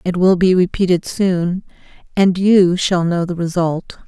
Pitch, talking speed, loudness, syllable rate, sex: 180 Hz, 160 wpm, -16 LUFS, 4.1 syllables/s, female